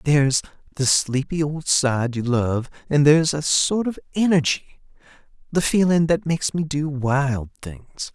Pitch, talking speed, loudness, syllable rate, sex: 145 Hz, 145 wpm, -20 LUFS, 4.2 syllables/s, male